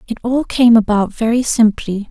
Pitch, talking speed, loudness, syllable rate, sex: 230 Hz, 170 wpm, -14 LUFS, 4.8 syllables/s, female